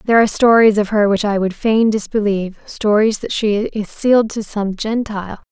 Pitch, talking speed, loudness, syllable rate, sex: 210 Hz, 185 wpm, -16 LUFS, 5.4 syllables/s, female